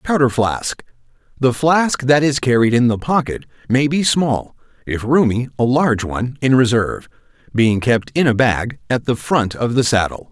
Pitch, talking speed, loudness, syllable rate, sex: 125 Hz, 175 wpm, -17 LUFS, 4.8 syllables/s, male